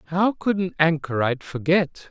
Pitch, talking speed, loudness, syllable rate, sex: 165 Hz, 140 wpm, -22 LUFS, 4.9 syllables/s, male